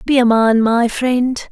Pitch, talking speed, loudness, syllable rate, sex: 240 Hz, 200 wpm, -14 LUFS, 3.8 syllables/s, female